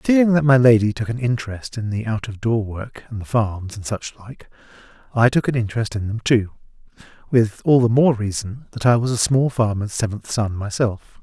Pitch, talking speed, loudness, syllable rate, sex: 115 Hz, 210 wpm, -20 LUFS, 5.2 syllables/s, male